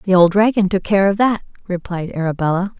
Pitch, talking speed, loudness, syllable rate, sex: 190 Hz, 195 wpm, -17 LUFS, 5.7 syllables/s, female